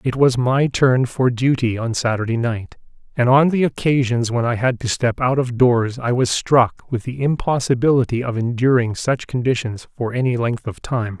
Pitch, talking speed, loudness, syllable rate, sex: 125 Hz, 195 wpm, -19 LUFS, 4.8 syllables/s, male